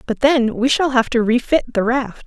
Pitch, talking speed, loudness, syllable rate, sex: 245 Hz, 240 wpm, -17 LUFS, 4.8 syllables/s, female